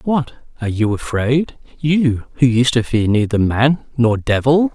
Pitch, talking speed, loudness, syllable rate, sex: 125 Hz, 150 wpm, -17 LUFS, 4.3 syllables/s, male